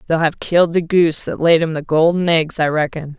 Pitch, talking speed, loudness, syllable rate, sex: 160 Hz, 245 wpm, -16 LUFS, 5.7 syllables/s, female